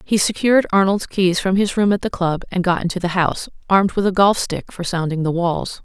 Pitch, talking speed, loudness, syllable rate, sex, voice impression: 185 Hz, 245 wpm, -18 LUFS, 5.7 syllables/s, female, very feminine, slightly gender-neutral, adult-like, tensed, powerful, bright, slightly hard, very clear, very fluent, slightly raspy, slightly cute, slightly cool, sincere, slightly calm, slightly friendly, slightly reassuring, unique, slightly elegant, lively, strict, slightly intense, slightly sharp